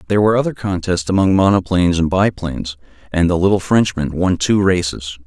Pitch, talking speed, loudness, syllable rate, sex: 90 Hz, 170 wpm, -16 LUFS, 6.0 syllables/s, male